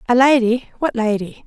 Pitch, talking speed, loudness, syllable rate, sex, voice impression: 235 Hz, 125 wpm, -17 LUFS, 4.9 syllables/s, female, feminine, adult-like, tensed, bright, soft, slightly raspy, calm, friendly, reassuring, lively, kind